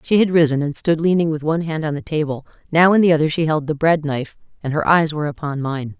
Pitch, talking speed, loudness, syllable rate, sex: 155 Hz, 260 wpm, -18 LUFS, 6.5 syllables/s, female